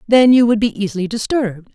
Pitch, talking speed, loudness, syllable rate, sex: 220 Hz, 205 wpm, -15 LUFS, 6.5 syllables/s, female